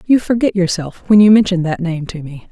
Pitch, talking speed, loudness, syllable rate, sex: 185 Hz, 240 wpm, -14 LUFS, 5.5 syllables/s, female